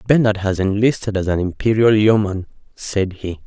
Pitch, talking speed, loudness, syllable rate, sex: 100 Hz, 155 wpm, -17 LUFS, 5.0 syllables/s, male